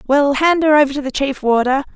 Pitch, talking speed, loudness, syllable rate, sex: 280 Hz, 245 wpm, -15 LUFS, 5.9 syllables/s, female